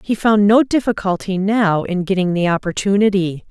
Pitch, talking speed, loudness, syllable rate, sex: 195 Hz, 155 wpm, -16 LUFS, 5.0 syllables/s, female